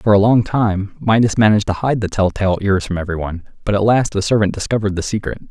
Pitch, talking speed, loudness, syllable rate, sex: 105 Hz, 240 wpm, -17 LUFS, 6.5 syllables/s, male